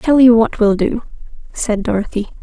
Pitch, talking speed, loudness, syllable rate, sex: 225 Hz, 175 wpm, -15 LUFS, 5.1 syllables/s, female